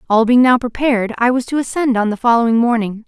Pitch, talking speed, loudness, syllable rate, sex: 240 Hz, 235 wpm, -15 LUFS, 6.3 syllables/s, female